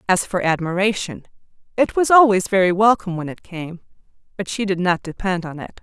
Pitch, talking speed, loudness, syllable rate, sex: 190 Hz, 185 wpm, -18 LUFS, 5.6 syllables/s, female